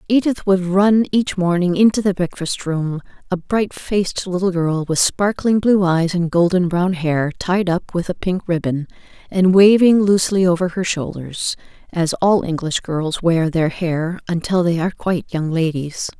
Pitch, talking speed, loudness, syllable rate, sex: 180 Hz, 170 wpm, -18 LUFS, 4.5 syllables/s, female